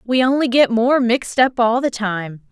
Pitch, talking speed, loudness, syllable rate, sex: 240 Hz, 215 wpm, -17 LUFS, 4.7 syllables/s, female